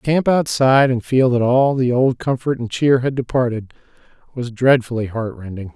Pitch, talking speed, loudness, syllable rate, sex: 125 Hz, 175 wpm, -17 LUFS, 5.1 syllables/s, male